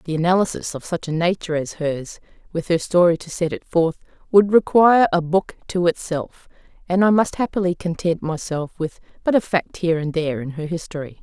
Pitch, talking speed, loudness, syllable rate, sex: 170 Hz, 200 wpm, -20 LUFS, 5.5 syllables/s, female